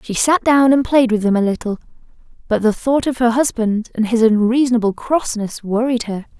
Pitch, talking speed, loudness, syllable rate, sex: 235 Hz, 195 wpm, -16 LUFS, 5.3 syllables/s, female